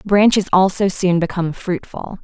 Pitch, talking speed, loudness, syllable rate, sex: 185 Hz, 135 wpm, -17 LUFS, 4.9 syllables/s, female